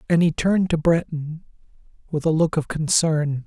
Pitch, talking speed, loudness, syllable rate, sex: 160 Hz, 175 wpm, -21 LUFS, 4.9 syllables/s, male